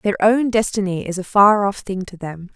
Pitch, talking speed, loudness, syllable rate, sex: 200 Hz, 235 wpm, -18 LUFS, 4.9 syllables/s, female